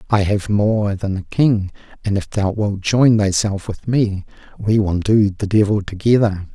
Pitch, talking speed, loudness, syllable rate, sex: 105 Hz, 185 wpm, -18 LUFS, 4.3 syllables/s, male